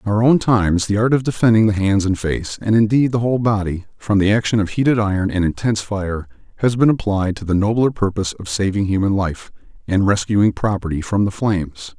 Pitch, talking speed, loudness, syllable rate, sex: 100 Hz, 215 wpm, -18 LUFS, 5.8 syllables/s, male